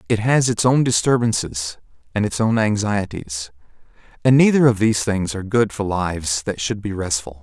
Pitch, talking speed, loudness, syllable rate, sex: 105 Hz, 180 wpm, -19 LUFS, 5.2 syllables/s, male